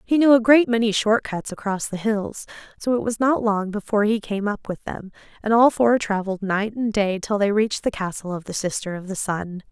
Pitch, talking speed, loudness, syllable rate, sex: 210 Hz, 240 wpm, -21 LUFS, 5.4 syllables/s, female